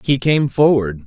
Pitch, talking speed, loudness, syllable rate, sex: 125 Hz, 170 wpm, -15 LUFS, 4.3 syllables/s, male